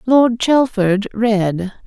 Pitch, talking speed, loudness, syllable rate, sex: 220 Hz, 95 wpm, -16 LUFS, 2.6 syllables/s, female